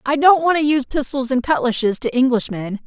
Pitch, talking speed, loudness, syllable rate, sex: 260 Hz, 210 wpm, -18 LUFS, 5.9 syllables/s, female